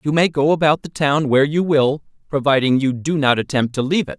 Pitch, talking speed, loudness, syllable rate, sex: 145 Hz, 230 wpm, -17 LUFS, 6.0 syllables/s, male